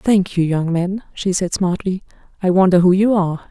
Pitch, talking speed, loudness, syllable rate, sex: 185 Hz, 205 wpm, -17 LUFS, 5.1 syllables/s, female